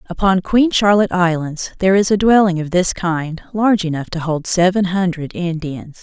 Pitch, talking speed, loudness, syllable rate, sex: 180 Hz, 180 wpm, -16 LUFS, 5.2 syllables/s, female